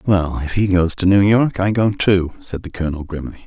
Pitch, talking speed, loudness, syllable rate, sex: 90 Hz, 245 wpm, -17 LUFS, 5.4 syllables/s, male